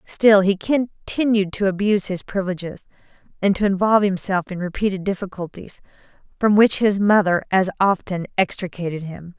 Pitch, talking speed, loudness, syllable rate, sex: 195 Hz, 140 wpm, -20 LUFS, 5.3 syllables/s, female